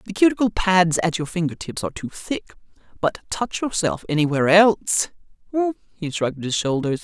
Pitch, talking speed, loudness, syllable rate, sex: 180 Hz, 160 wpm, -21 LUFS, 5.5 syllables/s, female